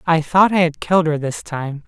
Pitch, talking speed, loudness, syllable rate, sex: 160 Hz, 255 wpm, -17 LUFS, 5.2 syllables/s, male